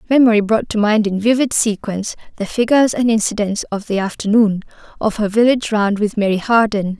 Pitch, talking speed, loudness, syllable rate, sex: 215 Hz, 180 wpm, -16 LUFS, 5.8 syllables/s, female